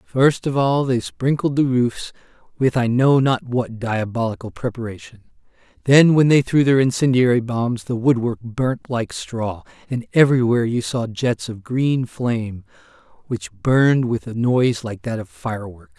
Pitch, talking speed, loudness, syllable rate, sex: 120 Hz, 160 wpm, -19 LUFS, 4.6 syllables/s, male